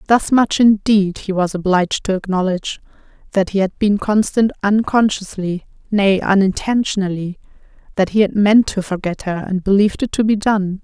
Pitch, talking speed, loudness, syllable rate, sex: 200 Hz, 160 wpm, -16 LUFS, 5.1 syllables/s, female